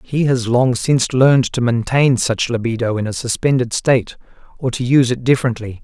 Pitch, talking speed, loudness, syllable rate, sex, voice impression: 125 Hz, 185 wpm, -16 LUFS, 5.6 syllables/s, male, masculine, adult-like, slightly fluent, slightly refreshing, sincere, slightly friendly, reassuring